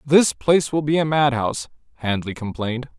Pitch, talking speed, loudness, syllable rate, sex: 135 Hz, 160 wpm, -21 LUFS, 5.6 syllables/s, male